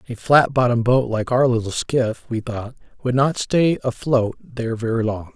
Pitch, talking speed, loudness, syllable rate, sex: 120 Hz, 190 wpm, -20 LUFS, 4.8 syllables/s, male